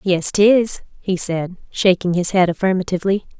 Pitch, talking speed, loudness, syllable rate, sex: 185 Hz, 140 wpm, -18 LUFS, 4.8 syllables/s, female